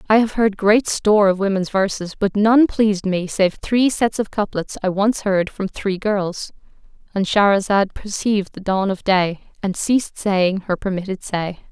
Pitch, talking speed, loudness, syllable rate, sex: 200 Hz, 180 wpm, -19 LUFS, 4.6 syllables/s, female